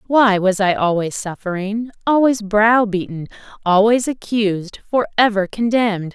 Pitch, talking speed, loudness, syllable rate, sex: 210 Hz, 115 wpm, -17 LUFS, 4.5 syllables/s, female